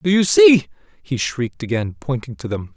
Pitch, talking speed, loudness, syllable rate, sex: 125 Hz, 195 wpm, -18 LUFS, 5.1 syllables/s, male